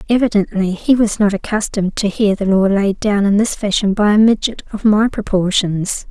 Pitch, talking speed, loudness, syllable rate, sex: 205 Hz, 195 wpm, -15 LUFS, 5.2 syllables/s, female